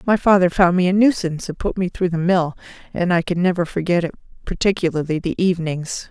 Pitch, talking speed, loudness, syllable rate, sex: 175 Hz, 205 wpm, -19 LUFS, 6.1 syllables/s, female